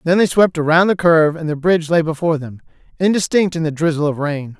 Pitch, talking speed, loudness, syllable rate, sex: 160 Hz, 235 wpm, -16 LUFS, 6.4 syllables/s, male